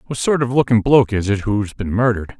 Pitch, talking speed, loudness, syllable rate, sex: 115 Hz, 250 wpm, -17 LUFS, 6.3 syllables/s, male